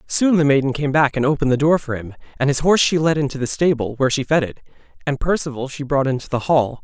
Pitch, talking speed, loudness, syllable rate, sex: 140 Hz, 265 wpm, -19 LUFS, 6.7 syllables/s, male